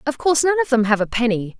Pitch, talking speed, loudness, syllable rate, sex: 235 Hz, 300 wpm, -18 LUFS, 8.7 syllables/s, female